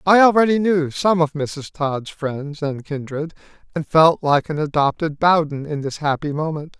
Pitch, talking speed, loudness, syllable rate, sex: 155 Hz, 175 wpm, -19 LUFS, 4.5 syllables/s, male